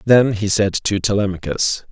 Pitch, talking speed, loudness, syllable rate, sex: 105 Hz, 155 wpm, -18 LUFS, 4.6 syllables/s, male